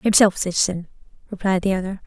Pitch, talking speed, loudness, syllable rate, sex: 190 Hz, 145 wpm, -20 LUFS, 6.3 syllables/s, female